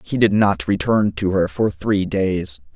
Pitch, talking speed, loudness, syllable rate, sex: 95 Hz, 195 wpm, -19 LUFS, 3.9 syllables/s, male